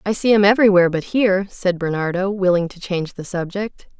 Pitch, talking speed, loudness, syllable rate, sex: 190 Hz, 195 wpm, -18 LUFS, 6.2 syllables/s, female